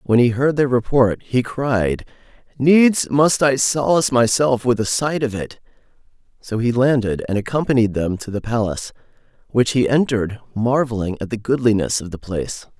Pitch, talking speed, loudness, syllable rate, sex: 120 Hz, 170 wpm, -18 LUFS, 5.0 syllables/s, male